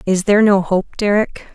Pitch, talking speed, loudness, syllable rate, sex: 200 Hz, 195 wpm, -15 LUFS, 5.2 syllables/s, female